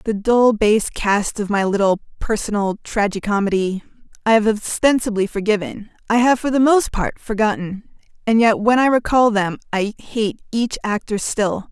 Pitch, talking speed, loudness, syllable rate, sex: 215 Hz, 155 wpm, -18 LUFS, 4.8 syllables/s, female